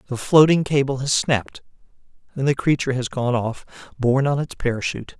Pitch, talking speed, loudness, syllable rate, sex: 135 Hz, 175 wpm, -20 LUFS, 6.1 syllables/s, male